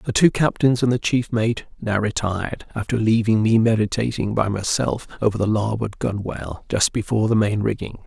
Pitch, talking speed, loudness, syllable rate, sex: 110 Hz, 180 wpm, -21 LUFS, 5.3 syllables/s, male